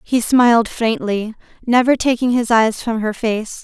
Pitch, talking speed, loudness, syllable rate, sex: 235 Hz, 165 wpm, -16 LUFS, 4.4 syllables/s, female